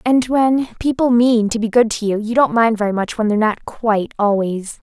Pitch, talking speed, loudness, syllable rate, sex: 225 Hz, 220 wpm, -17 LUFS, 5.3 syllables/s, female